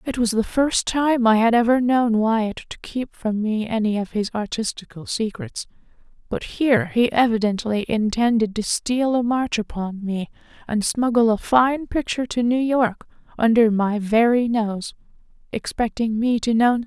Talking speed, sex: 180 wpm, female